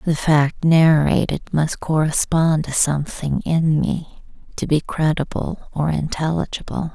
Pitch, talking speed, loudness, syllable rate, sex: 155 Hz, 120 wpm, -19 LUFS, 4.1 syllables/s, female